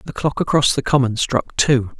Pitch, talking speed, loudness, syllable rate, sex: 135 Hz, 210 wpm, -18 LUFS, 5.0 syllables/s, male